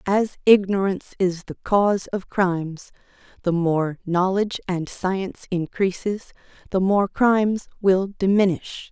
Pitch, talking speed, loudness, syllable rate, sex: 190 Hz, 120 wpm, -22 LUFS, 4.5 syllables/s, female